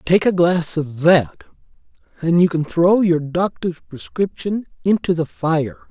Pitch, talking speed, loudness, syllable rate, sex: 165 Hz, 150 wpm, -18 LUFS, 4.2 syllables/s, male